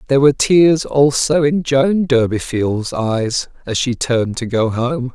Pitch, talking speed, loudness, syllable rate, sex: 130 Hz, 165 wpm, -16 LUFS, 4.2 syllables/s, male